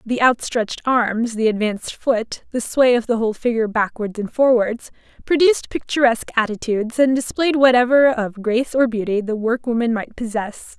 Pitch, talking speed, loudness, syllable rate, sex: 235 Hz, 165 wpm, -19 LUFS, 5.4 syllables/s, female